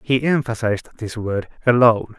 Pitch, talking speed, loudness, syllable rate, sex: 115 Hz, 135 wpm, -19 LUFS, 5.5 syllables/s, male